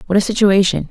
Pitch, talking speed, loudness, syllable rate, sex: 200 Hz, 200 wpm, -14 LUFS, 6.9 syllables/s, female